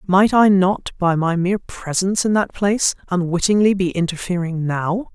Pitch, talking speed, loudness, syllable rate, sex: 185 Hz, 165 wpm, -18 LUFS, 4.9 syllables/s, female